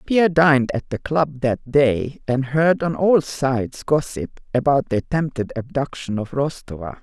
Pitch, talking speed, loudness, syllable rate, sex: 140 Hz, 160 wpm, -20 LUFS, 4.5 syllables/s, female